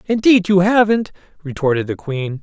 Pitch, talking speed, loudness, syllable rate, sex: 175 Hz, 150 wpm, -16 LUFS, 5.1 syllables/s, male